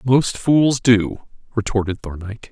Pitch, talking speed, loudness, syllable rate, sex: 115 Hz, 120 wpm, -18 LUFS, 4.2 syllables/s, male